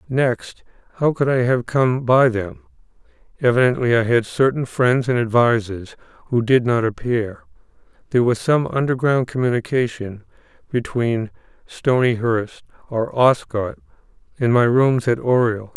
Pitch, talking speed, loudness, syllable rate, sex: 120 Hz, 125 wpm, -19 LUFS, 4.4 syllables/s, male